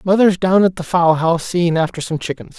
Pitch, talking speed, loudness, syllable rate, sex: 175 Hz, 230 wpm, -16 LUFS, 5.6 syllables/s, male